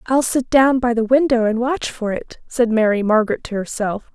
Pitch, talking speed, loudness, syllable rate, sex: 235 Hz, 215 wpm, -18 LUFS, 5.0 syllables/s, female